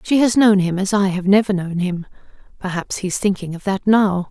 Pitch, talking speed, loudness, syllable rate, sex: 195 Hz, 225 wpm, -18 LUFS, 5.4 syllables/s, female